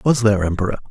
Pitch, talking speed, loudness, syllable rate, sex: 110 Hz, 200 wpm, -18 LUFS, 7.8 syllables/s, male